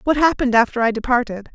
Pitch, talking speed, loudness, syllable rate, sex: 250 Hz, 195 wpm, -17 LUFS, 7.0 syllables/s, female